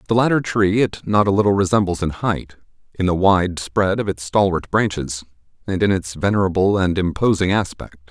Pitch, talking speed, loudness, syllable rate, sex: 95 Hz, 185 wpm, -19 LUFS, 5.3 syllables/s, male